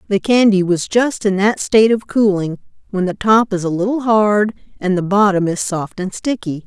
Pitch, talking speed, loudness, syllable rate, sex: 200 Hz, 205 wpm, -16 LUFS, 4.9 syllables/s, female